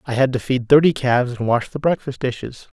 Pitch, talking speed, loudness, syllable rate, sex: 130 Hz, 235 wpm, -19 LUFS, 5.8 syllables/s, male